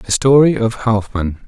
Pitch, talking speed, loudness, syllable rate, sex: 115 Hz, 160 wpm, -14 LUFS, 4.3 syllables/s, male